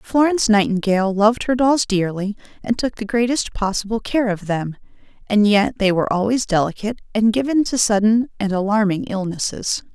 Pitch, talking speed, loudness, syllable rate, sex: 215 Hz, 165 wpm, -19 LUFS, 5.4 syllables/s, female